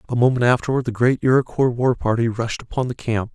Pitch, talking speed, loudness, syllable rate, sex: 120 Hz, 215 wpm, -20 LUFS, 6.0 syllables/s, male